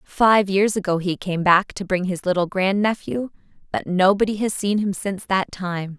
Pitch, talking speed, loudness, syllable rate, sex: 195 Hz, 200 wpm, -21 LUFS, 4.7 syllables/s, female